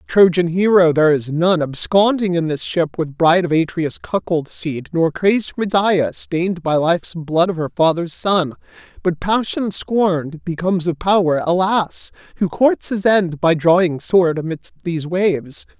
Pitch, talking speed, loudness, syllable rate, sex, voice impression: 175 Hz, 165 wpm, -17 LUFS, 4.6 syllables/s, male, masculine, adult-like, slightly muffled, slightly refreshing, friendly, slightly unique